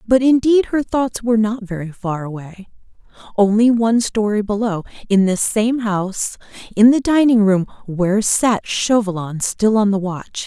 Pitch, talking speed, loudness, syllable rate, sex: 215 Hz, 160 wpm, -17 LUFS, 4.6 syllables/s, female